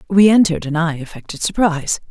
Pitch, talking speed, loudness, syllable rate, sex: 170 Hz, 170 wpm, -16 LUFS, 6.5 syllables/s, female